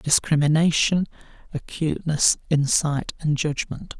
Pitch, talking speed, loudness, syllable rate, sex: 155 Hz, 75 wpm, -22 LUFS, 4.2 syllables/s, male